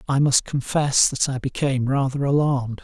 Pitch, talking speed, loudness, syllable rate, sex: 135 Hz, 170 wpm, -21 LUFS, 5.3 syllables/s, male